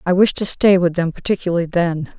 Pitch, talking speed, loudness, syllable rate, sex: 180 Hz, 220 wpm, -17 LUFS, 5.9 syllables/s, female